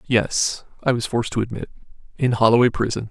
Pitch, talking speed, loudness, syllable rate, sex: 115 Hz, 175 wpm, -20 LUFS, 6.0 syllables/s, male